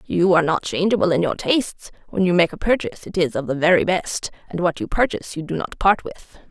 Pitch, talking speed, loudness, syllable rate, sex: 185 Hz, 250 wpm, -20 LUFS, 6.0 syllables/s, female